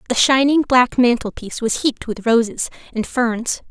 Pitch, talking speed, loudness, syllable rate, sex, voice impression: 240 Hz, 160 wpm, -18 LUFS, 5.1 syllables/s, female, feminine, slightly adult-like, clear, fluent, slightly cute, slightly refreshing, slightly unique